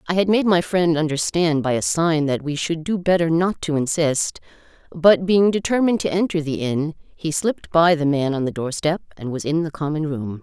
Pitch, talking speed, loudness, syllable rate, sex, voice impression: 160 Hz, 220 wpm, -20 LUFS, 5.1 syllables/s, female, slightly masculine, slightly feminine, very gender-neutral, slightly middle-aged, slightly thick, tensed, powerful, bright, hard, clear, fluent, slightly cool, slightly intellectual, refreshing, sincere, calm, slightly friendly, slightly reassuring, slightly unique, slightly elegant, slightly wild, slightly sweet, lively, slightly strict, slightly intense, sharp